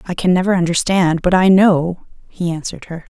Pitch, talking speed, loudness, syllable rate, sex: 175 Hz, 190 wpm, -15 LUFS, 5.5 syllables/s, female